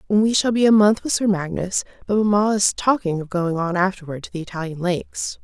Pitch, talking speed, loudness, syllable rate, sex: 190 Hz, 220 wpm, -20 LUFS, 5.6 syllables/s, female